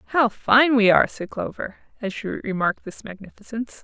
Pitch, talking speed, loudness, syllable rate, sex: 220 Hz, 170 wpm, -21 LUFS, 5.4 syllables/s, female